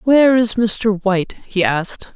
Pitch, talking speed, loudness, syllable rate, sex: 210 Hz, 165 wpm, -16 LUFS, 4.6 syllables/s, female